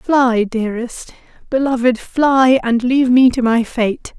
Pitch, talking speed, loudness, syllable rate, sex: 245 Hz, 130 wpm, -15 LUFS, 4.0 syllables/s, female